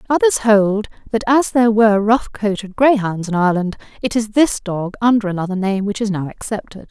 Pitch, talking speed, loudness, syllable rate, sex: 210 Hz, 190 wpm, -17 LUFS, 5.5 syllables/s, female